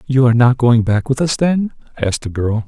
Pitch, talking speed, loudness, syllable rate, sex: 125 Hz, 245 wpm, -15 LUFS, 5.7 syllables/s, male